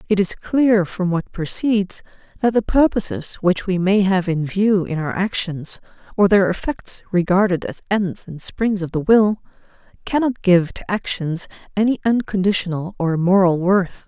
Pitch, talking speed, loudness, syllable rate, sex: 190 Hz, 160 wpm, -19 LUFS, 4.6 syllables/s, female